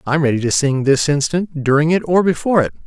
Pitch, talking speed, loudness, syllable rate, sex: 145 Hz, 210 wpm, -16 LUFS, 6.2 syllables/s, male